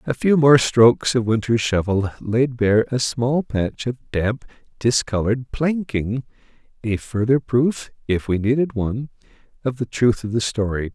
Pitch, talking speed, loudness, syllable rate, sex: 120 Hz, 160 wpm, -20 LUFS, 4.5 syllables/s, male